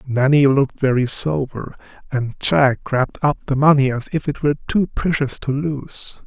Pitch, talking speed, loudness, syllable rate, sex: 140 Hz, 170 wpm, -18 LUFS, 4.6 syllables/s, male